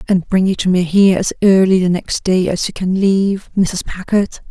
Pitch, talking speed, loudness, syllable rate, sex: 190 Hz, 225 wpm, -15 LUFS, 5.1 syllables/s, female